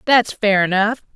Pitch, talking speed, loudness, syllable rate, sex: 210 Hz, 155 wpm, -17 LUFS, 4.5 syllables/s, female